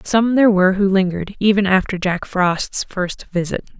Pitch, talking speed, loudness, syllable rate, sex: 190 Hz, 190 wpm, -17 LUFS, 5.4 syllables/s, female